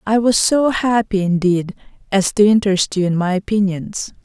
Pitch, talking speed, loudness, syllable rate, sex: 200 Hz, 170 wpm, -16 LUFS, 4.9 syllables/s, female